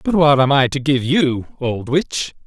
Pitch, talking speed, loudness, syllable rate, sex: 140 Hz, 220 wpm, -17 LUFS, 4.0 syllables/s, male